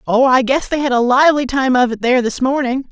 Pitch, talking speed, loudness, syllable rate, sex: 260 Hz, 270 wpm, -14 LUFS, 6.2 syllables/s, female